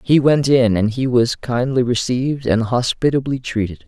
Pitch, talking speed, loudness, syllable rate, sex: 125 Hz, 170 wpm, -17 LUFS, 4.8 syllables/s, male